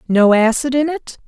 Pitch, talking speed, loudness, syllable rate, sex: 255 Hz, 190 wpm, -15 LUFS, 4.8 syllables/s, female